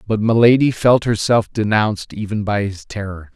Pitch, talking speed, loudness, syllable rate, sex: 105 Hz, 160 wpm, -17 LUFS, 5.0 syllables/s, male